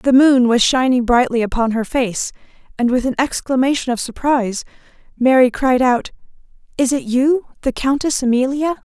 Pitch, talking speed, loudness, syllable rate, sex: 255 Hz, 155 wpm, -16 LUFS, 5.0 syllables/s, female